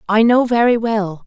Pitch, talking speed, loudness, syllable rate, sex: 220 Hz, 190 wpm, -15 LUFS, 4.6 syllables/s, female